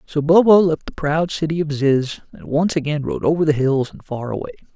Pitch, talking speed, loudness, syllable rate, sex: 155 Hz, 225 wpm, -18 LUFS, 5.5 syllables/s, male